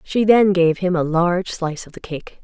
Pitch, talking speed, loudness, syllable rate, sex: 175 Hz, 245 wpm, -17 LUFS, 5.2 syllables/s, female